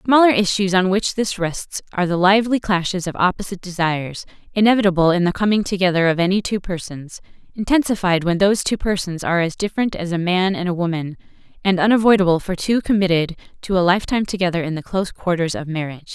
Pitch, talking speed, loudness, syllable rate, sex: 185 Hz, 195 wpm, -19 LUFS, 6.6 syllables/s, female